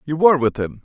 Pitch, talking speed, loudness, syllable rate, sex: 145 Hz, 285 wpm, -17 LUFS, 6.9 syllables/s, male